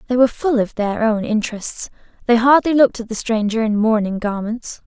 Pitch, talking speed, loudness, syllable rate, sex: 225 Hz, 195 wpm, -18 LUFS, 5.6 syllables/s, female